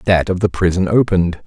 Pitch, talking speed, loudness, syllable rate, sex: 90 Hz, 205 wpm, -16 LUFS, 6.1 syllables/s, male